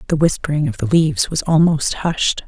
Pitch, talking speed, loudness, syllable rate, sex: 155 Hz, 195 wpm, -17 LUFS, 5.3 syllables/s, female